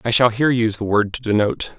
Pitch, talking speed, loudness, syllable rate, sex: 115 Hz, 270 wpm, -18 LUFS, 7.1 syllables/s, male